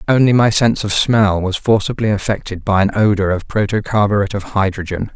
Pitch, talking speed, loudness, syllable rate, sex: 105 Hz, 175 wpm, -16 LUFS, 5.7 syllables/s, male